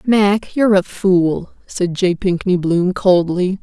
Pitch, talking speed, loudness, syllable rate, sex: 185 Hz, 150 wpm, -16 LUFS, 3.6 syllables/s, female